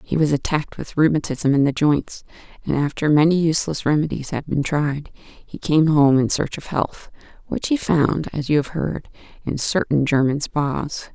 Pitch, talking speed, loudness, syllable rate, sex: 150 Hz, 185 wpm, -20 LUFS, 4.7 syllables/s, female